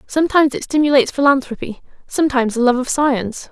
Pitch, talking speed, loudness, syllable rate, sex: 265 Hz, 155 wpm, -16 LUFS, 7.1 syllables/s, female